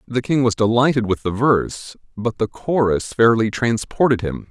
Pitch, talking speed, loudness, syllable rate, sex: 115 Hz, 175 wpm, -19 LUFS, 4.8 syllables/s, male